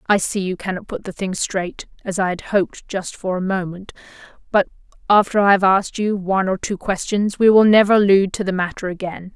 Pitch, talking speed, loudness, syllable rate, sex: 190 Hz, 220 wpm, -19 LUFS, 5.7 syllables/s, female